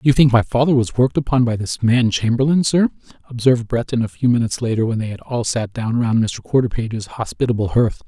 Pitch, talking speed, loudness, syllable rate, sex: 120 Hz, 215 wpm, -18 LUFS, 6.3 syllables/s, male